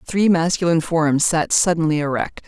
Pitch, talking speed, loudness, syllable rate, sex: 165 Hz, 145 wpm, -18 LUFS, 5.2 syllables/s, female